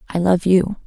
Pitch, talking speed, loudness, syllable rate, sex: 180 Hz, 210 wpm, -17 LUFS, 4.7 syllables/s, female